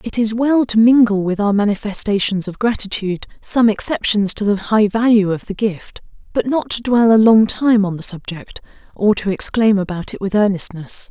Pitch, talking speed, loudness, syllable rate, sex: 210 Hz, 195 wpm, -16 LUFS, 5.1 syllables/s, female